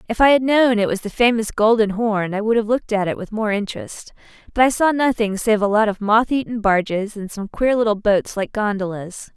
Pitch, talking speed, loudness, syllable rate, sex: 215 Hz, 235 wpm, -18 LUFS, 5.5 syllables/s, female